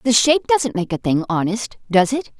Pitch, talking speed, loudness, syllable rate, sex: 225 Hz, 225 wpm, -18 LUFS, 5.2 syllables/s, female